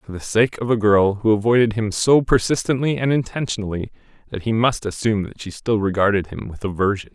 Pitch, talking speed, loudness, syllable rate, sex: 110 Hz, 200 wpm, -20 LUFS, 5.8 syllables/s, male